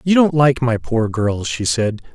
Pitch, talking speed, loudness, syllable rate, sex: 125 Hz, 225 wpm, -17 LUFS, 4.1 syllables/s, male